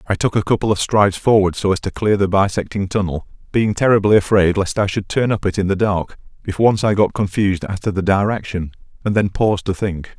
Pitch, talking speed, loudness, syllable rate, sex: 100 Hz, 235 wpm, -17 LUFS, 5.9 syllables/s, male